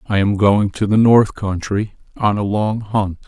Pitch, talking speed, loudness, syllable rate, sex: 105 Hz, 200 wpm, -17 LUFS, 4.3 syllables/s, male